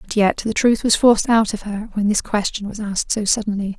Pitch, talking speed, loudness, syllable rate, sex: 210 Hz, 255 wpm, -18 LUFS, 5.7 syllables/s, female